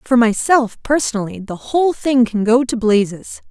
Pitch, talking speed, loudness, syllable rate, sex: 235 Hz, 170 wpm, -16 LUFS, 4.8 syllables/s, female